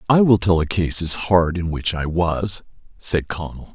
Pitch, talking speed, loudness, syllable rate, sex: 90 Hz, 210 wpm, -20 LUFS, 4.4 syllables/s, male